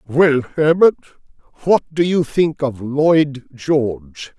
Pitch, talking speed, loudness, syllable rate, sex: 140 Hz, 125 wpm, -16 LUFS, 3.3 syllables/s, male